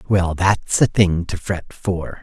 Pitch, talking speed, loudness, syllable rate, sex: 90 Hz, 190 wpm, -19 LUFS, 3.4 syllables/s, male